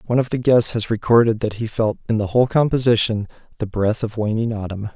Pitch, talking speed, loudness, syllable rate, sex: 115 Hz, 220 wpm, -19 LUFS, 6.2 syllables/s, male